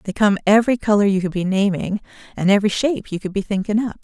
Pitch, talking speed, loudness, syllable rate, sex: 205 Hz, 240 wpm, -19 LUFS, 6.9 syllables/s, female